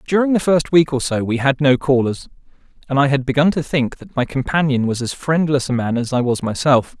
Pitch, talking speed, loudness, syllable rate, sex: 140 Hz, 240 wpm, -17 LUFS, 5.6 syllables/s, male